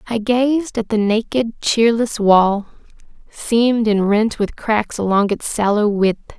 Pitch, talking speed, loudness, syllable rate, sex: 220 Hz, 150 wpm, -17 LUFS, 3.9 syllables/s, female